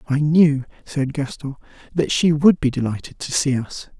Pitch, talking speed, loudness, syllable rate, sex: 145 Hz, 180 wpm, -20 LUFS, 4.6 syllables/s, male